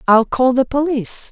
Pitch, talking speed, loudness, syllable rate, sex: 260 Hz, 180 wpm, -16 LUFS, 5.1 syllables/s, female